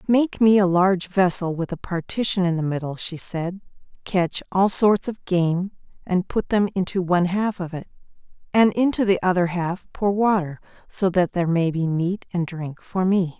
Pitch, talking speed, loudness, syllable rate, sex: 185 Hz, 195 wpm, -22 LUFS, 4.8 syllables/s, female